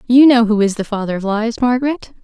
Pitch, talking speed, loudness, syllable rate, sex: 230 Hz, 240 wpm, -15 LUFS, 6.1 syllables/s, female